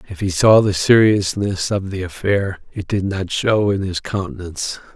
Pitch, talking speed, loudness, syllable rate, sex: 95 Hz, 180 wpm, -18 LUFS, 4.7 syllables/s, male